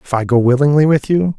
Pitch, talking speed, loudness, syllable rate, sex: 140 Hz, 260 wpm, -13 LUFS, 6.2 syllables/s, male